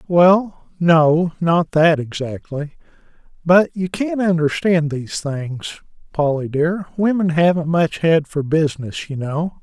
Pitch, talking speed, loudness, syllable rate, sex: 165 Hz, 120 wpm, -18 LUFS, 3.8 syllables/s, male